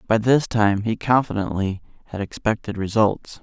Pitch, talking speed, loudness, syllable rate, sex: 110 Hz, 140 wpm, -21 LUFS, 4.7 syllables/s, male